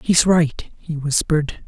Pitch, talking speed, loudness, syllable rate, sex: 155 Hz, 145 wpm, -18 LUFS, 4.0 syllables/s, male